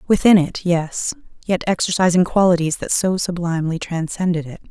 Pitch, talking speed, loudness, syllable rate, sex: 175 Hz, 140 wpm, -18 LUFS, 5.4 syllables/s, female